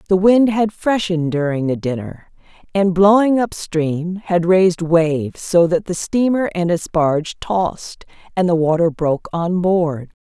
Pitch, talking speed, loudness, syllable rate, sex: 175 Hz, 165 wpm, -17 LUFS, 4.4 syllables/s, female